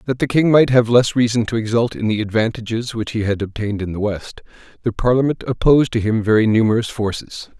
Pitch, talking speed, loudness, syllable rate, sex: 115 Hz, 215 wpm, -18 LUFS, 6.1 syllables/s, male